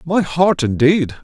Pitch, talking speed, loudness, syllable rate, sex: 155 Hz, 145 wpm, -15 LUFS, 3.7 syllables/s, male